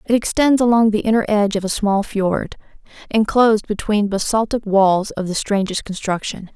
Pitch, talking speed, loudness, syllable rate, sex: 210 Hz, 165 wpm, -18 LUFS, 5.1 syllables/s, female